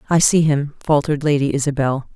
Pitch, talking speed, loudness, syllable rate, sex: 145 Hz, 165 wpm, -18 LUFS, 6.0 syllables/s, female